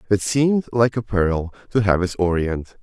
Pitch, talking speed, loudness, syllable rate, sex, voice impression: 100 Hz, 190 wpm, -20 LUFS, 4.7 syllables/s, male, very masculine, very adult-like, slightly old, very thick, slightly relaxed, very powerful, bright, soft, slightly muffled, very fluent, slightly raspy, very cool, intellectual, slightly refreshing, sincere, very calm, very mature, very friendly, very reassuring, very unique, elegant, slightly wild, very sweet, lively, very kind, slightly modest